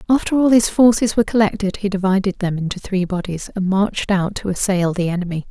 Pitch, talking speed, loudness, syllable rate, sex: 195 Hz, 205 wpm, -18 LUFS, 6.1 syllables/s, female